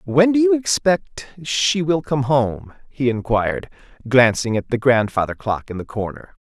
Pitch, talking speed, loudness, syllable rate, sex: 135 Hz, 160 wpm, -19 LUFS, 4.3 syllables/s, male